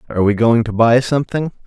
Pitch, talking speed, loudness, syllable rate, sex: 120 Hz, 215 wpm, -15 LUFS, 6.8 syllables/s, male